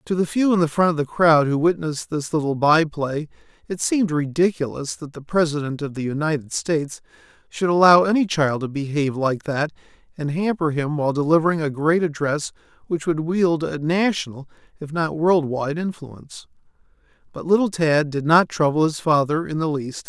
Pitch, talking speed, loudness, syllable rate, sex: 155 Hz, 180 wpm, -21 LUFS, 5.3 syllables/s, male